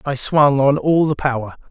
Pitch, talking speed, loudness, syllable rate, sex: 140 Hz, 210 wpm, -16 LUFS, 4.8 syllables/s, male